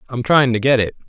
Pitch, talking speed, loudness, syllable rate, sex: 125 Hz, 280 wpm, -16 LUFS, 6.2 syllables/s, male